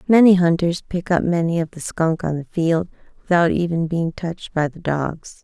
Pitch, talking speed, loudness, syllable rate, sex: 170 Hz, 200 wpm, -20 LUFS, 4.9 syllables/s, female